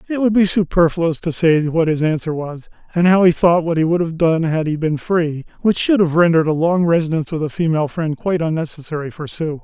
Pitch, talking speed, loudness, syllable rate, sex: 165 Hz, 235 wpm, -17 LUFS, 5.9 syllables/s, male